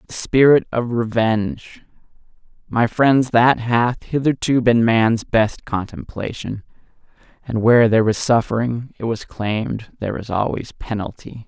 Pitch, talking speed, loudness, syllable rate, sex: 115 Hz, 130 wpm, -18 LUFS, 4.4 syllables/s, male